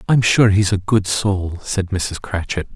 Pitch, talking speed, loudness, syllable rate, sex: 100 Hz, 195 wpm, -18 LUFS, 4.1 syllables/s, male